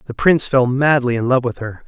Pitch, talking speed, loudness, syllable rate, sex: 130 Hz, 255 wpm, -16 LUFS, 5.9 syllables/s, male